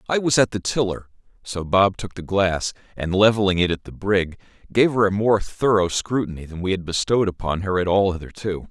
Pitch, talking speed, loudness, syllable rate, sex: 95 Hz, 215 wpm, -21 LUFS, 5.5 syllables/s, male